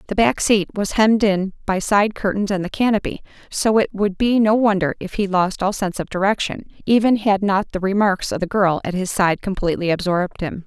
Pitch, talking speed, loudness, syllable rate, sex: 195 Hz, 220 wpm, -19 LUFS, 5.5 syllables/s, female